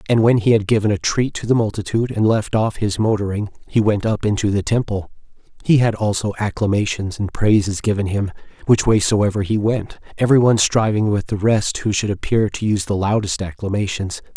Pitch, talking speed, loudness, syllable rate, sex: 105 Hz, 200 wpm, -18 LUFS, 5.7 syllables/s, male